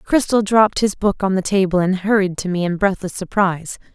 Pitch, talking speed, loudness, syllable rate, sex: 190 Hz, 215 wpm, -18 LUFS, 5.6 syllables/s, female